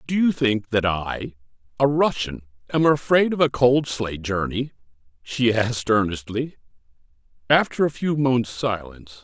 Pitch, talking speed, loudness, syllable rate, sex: 120 Hz, 145 wpm, -22 LUFS, 4.7 syllables/s, male